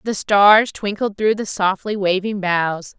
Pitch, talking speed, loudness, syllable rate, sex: 200 Hz, 160 wpm, -17 LUFS, 3.8 syllables/s, female